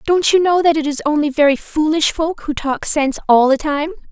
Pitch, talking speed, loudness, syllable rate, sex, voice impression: 300 Hz, 235 wpm, -16 LUFS, 5.4 syllables/s, female, feminine, slightly adult-like, clear, fluent, slightly cute, slightly refreshing, slightly unique